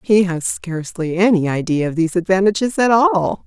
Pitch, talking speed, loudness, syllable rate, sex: 185 Hz, 175 wpm, -17 LUFS, 5.3 syllables/s, female